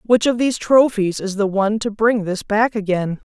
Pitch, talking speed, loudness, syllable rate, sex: 215 Hz, 220 wpm, -18 LUFS, 5.0 syllables/s, female